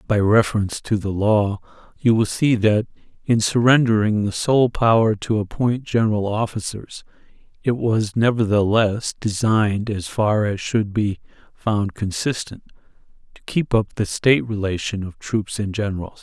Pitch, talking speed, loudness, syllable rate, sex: 110 Hz, 145 wpm, -20 LUFS, 4.6 syllables/s, male